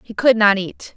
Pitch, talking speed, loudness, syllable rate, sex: 215 Hz, 250 wpm, -16 LUFS, 4.7 syllables/s, female